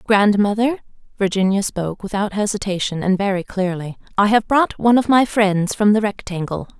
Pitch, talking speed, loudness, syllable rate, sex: 205 Hz, 160 wpm, -18 LUFS, 5.3 syllables/s, female